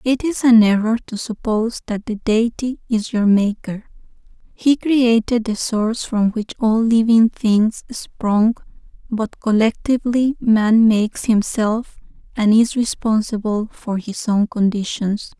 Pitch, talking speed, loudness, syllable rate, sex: 220 Hz, 135 wpm, -18 LUFS, 4.0 syllables/s, female